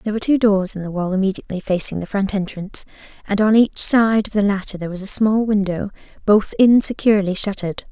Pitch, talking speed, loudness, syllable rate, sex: 200 Hz, 205 wpm, -18 LUFS, 6.5 syllables/s, female